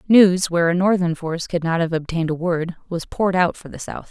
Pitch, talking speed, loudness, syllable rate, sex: 170 Hz, 250 wpm, -20 LUFS, 6.1 syllables/s, female